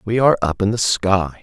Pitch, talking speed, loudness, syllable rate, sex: 105 Hz, 250 wpm, -17 LUFS, 5.5 syllables/s, male